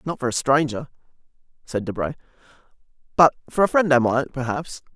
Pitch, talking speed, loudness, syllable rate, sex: 140 Hz, 155 wpm, -21 LUFS, 5.8 syllables/s, male